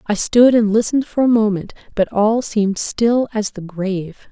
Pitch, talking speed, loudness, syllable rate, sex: 215 Hz, 195 wpm, -17 LUFS, 4.8 syllables/s, female